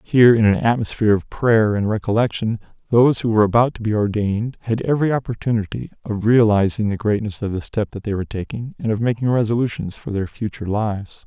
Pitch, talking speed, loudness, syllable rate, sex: 110 Hz, 195 wpm, -19 LUFS, 6.3 syllables/s, male